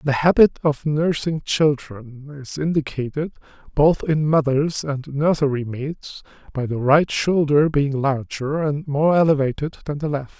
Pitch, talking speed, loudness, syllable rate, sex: 145 Hz, 145 wpm, -20 LUFS, 4.1 syllables/s, male